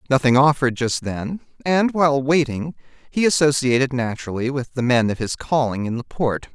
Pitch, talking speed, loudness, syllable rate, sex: 135 Hz, 175 wpm, -20 LUFS, 5.4 syllables/s, male